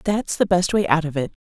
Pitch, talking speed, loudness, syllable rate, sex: 170 Hz, 290 wpm, -20 LUFS, 5.7 syllables/s, female